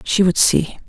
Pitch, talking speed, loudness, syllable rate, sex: 180 Hz, 205 wpm, -16 LUFS, 4.2 syllables/s, female